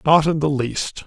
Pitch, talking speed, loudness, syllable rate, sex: 150 Hz, 225 wpm, -20 LUFS, 4.2 syllables/s, male